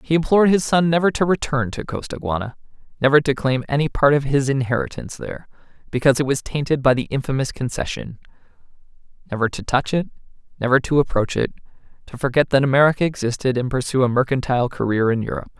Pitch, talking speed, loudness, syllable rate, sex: 135 Hz, 175 wpm, -20 LUFS, 6.7 syllables/s, male